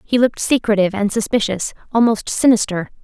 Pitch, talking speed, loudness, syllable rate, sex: 215 Hz, 140 wpm, -17 LUFS, 6.0 syllables/s, female